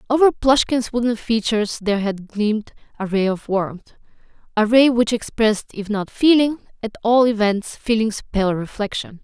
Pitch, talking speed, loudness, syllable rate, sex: 220 Hz, 150 wpm, -19 LUFS, 5.0 syllables/s, female